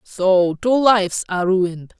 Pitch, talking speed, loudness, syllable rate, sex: 195 Hz, 150 wpm, -17 LUFS, 4.5 syllables/s, female